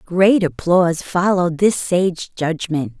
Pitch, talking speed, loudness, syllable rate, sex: 175 Hz, 120 wpm, -17 LUFS, 3.8 syllables/s, female